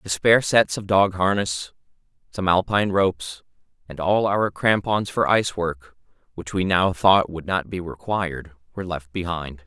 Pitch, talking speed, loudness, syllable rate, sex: 90 Hz, 170 wpm, -21 LUFS, 4.8 syllables/s, male